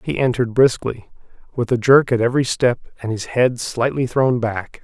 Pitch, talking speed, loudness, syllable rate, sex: 125 Hz, 185 wpm, -18 LUFS, 5.2 syllables/s, male